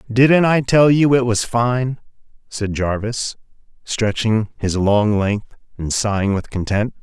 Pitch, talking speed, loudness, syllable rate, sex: 115 Hz, 145 wpm, -18 LUFS, 3.8 syllables/s, male